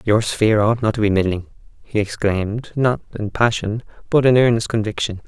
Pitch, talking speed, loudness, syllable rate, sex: 110 Hz, 180 wpm, -19 LUFS, 5.6 syllables/s, male